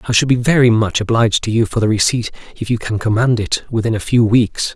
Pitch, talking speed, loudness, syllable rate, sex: 115 Hz, 250 wpm, -15 LUFS, 6.0 syllables/s, male